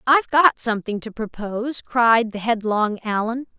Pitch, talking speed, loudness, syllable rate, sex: 230 Hz, 150 wpm, -20 LUFS, 4.8 syllables/s, female